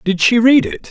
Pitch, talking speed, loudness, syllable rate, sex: 200 Hz, 265 wpm, -12 LUFS, 4.9 syllables/s, male